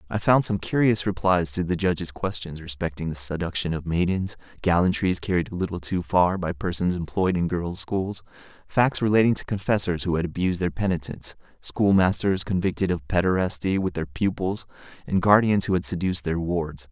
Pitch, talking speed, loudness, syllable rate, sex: 90 Hz, 175 wpm, -24 LUFS, 5.4 syllables/s, male